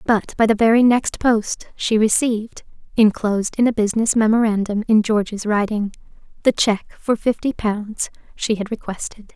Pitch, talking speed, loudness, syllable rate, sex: 215 Hz, 155 wpm, -19 LUFS, 4.9 syllables/s, female